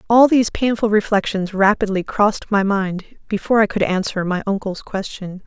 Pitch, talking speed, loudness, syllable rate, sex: 205 Hz, 165 wpm, -18 LUFS, 5.5 syllables/s, female